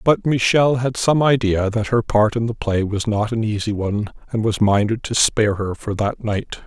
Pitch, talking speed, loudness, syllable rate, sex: 110 Hz, 225 wpm, -19 LUFS, 4.9 syllables/s, male